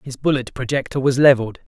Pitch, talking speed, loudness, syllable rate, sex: 130 Hz, 170 wpm, -18 LUFS, 6.5 syllables/s, male